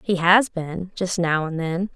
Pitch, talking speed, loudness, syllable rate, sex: 175 Hz, 185 wpm, -21 LUFS, 3.9 syllables/s, female